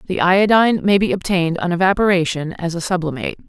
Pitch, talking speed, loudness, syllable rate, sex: 180 Hz, 170 wpm, -17 LUFS, 6.9 syllables/s, female